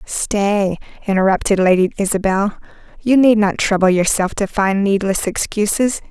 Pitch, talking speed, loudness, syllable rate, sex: 200 Hz, 130 wpm, -16 LUFS, 4.6 syllables/s, female